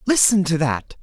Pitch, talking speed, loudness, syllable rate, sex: 175 Hz, 175 wpm, -18 LUFS, 4.6 syllables/s, male